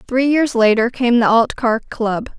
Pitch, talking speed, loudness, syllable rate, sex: 235 Hz, 175 wpm, -16 LUFS, 4.2 syllables/s, female